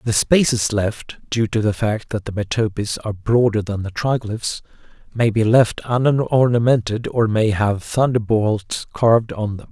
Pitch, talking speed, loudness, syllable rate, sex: 110 Hz, 160 wpm, -19 LUFS, 2.8 syllables/s, male